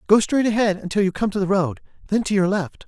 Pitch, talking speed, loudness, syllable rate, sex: 195 Hz, 270 wpm, -21 LUFS, 6.3 syllables/s, male